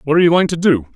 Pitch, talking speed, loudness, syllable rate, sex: 155 Hz, 380 wpm, -14 LUFS, 8.9 syllables/s, male